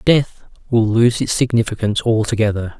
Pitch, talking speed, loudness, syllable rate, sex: 115 Hz, 130 wpm, -17 LUFS, 5.4 syllables/s, male